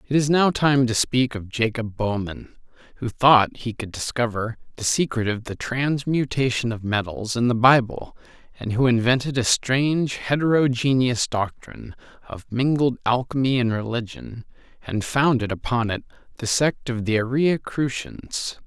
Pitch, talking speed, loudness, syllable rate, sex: 120 Hz, 150 wpm, -22 LUFS, 4.6 syllables/s, male